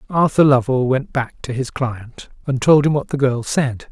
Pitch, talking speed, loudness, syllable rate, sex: 130 Hz, 215 wpm, -18 LUFS, 4.8 syllables/s, male